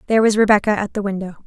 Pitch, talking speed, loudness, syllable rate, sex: 205 Hz, 245 wpm, -17 LUFS, 8.6 syllables/s, female